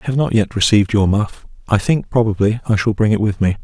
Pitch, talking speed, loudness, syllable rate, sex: 105 Hz, 265 wpm, -16 LUFS, 6.3 syllables/s, male